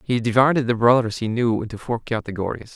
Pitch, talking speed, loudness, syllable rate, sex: 115 Hz, 195 wpm, -21 LUFS, 6.0 syllables/s, male